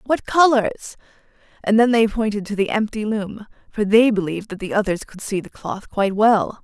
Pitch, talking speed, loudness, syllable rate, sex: 215 Hz, 200 wpm, -19 LUFS, 5.4 syllables/s, female